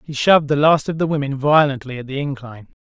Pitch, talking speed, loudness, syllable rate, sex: 140 Hz, 230 wpm, -17 LUFS, 6.5 syllables/s, male